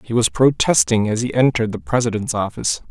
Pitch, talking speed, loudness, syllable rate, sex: 115 Hz, 185 wpm, -18 LUFS, 6.2 syllables/s, male